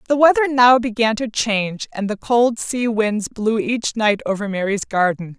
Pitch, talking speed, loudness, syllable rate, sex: 220 Hz, 190 wpm, -18 LUFS, 4.6 syllables/s, female